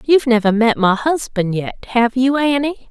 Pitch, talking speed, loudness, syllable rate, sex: 245 Hz, 185 wpm, -16 LUFS, 4.7 syllables/s, female